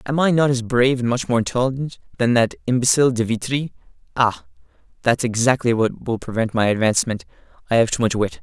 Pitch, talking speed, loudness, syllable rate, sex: 120 Hz, 190 wpm, -19 LUFS, 6.3 syllables/s, male